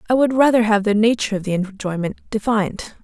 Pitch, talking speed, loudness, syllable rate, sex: 215 Hz, 200 wpm, -19 LUFS, 6.3 syllables/s, female